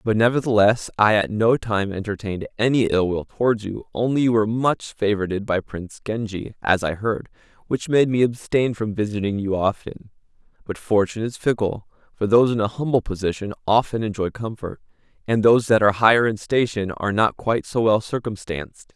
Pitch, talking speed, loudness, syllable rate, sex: 110 Hz, 180 wpm, -21 LUFS, 5.6 syllables/s, male